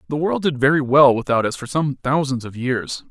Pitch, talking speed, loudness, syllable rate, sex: 135 Hz, 230 wpm, -19 LUFS, 5.2 syllables/s, male